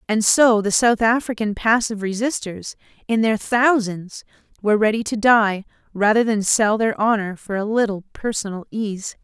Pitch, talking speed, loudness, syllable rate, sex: 215 Hz, 155 wpm, -19 LUFS, 4.8 syllables/s, female